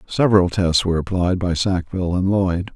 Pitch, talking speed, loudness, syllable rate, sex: 90 Hz, 175 wpm, -19 LUFS, 5.4 syllables/s, male